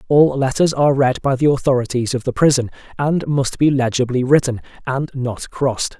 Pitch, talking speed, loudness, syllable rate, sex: 135 Hz, 180 wpm, -17 LUFS, 5.3 syllables/s, male